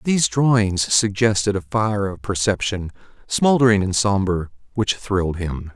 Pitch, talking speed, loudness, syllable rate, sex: 105 Hz, 135 wpm, -20 LUFS, 4.6 syllables/s, male